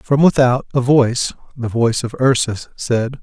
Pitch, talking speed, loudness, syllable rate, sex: 125 Hz, 170 wpm, -16 LUFS, 4.6 syllables/s, male